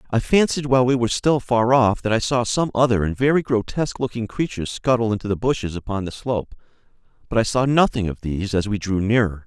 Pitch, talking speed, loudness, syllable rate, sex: 115 Hz, 220 wpm, -20 LUFS, 6.3 syllables/s, male